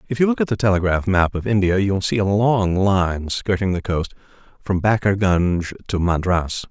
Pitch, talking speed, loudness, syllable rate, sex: 95 Hz, 195 wpm, -19 LUFS, 5.1 syllables/s, male